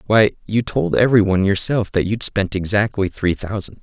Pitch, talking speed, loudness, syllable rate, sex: 100 Hz, 190 wpm, -18 LUFS, 5.4 syllables/s, male